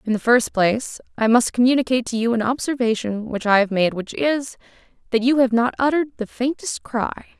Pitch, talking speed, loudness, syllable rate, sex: 240 Hz, 205 wpm, -20 LUFS, 5.6 syllables/s, female